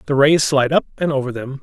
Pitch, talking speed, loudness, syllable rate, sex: 140 Hz, 260 wpm, -17 LUFS, 6.7 syllables/s, male